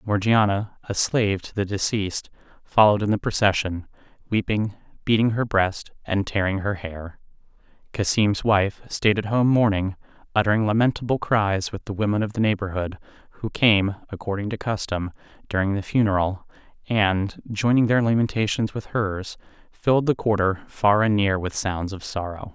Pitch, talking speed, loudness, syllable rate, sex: 105 Hz, 150 wpm, -23 LUFS, 5.0 syllables/s, male